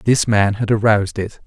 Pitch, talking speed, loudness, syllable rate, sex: 105 Hz, 205 wpm, -17 LUFS, 5.0 syllables/s, male